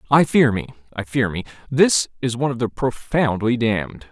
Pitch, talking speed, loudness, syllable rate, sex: 120 Hz, 190 wpm, -20 LUFS, 5.2 syllables/s, male